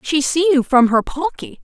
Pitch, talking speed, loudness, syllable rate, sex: 295 Hz, 220 wpm, -16 LUFS, 4.6 syllables/s, female